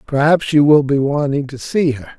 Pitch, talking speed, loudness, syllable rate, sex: 145 Hz, 220 wpm, -15 LUFS, 5.1 syllables/s, male